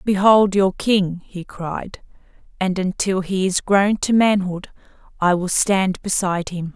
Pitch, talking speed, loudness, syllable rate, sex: 190 Hz, 150 wpm, -19 LUFS, 3.9 syllables/s, female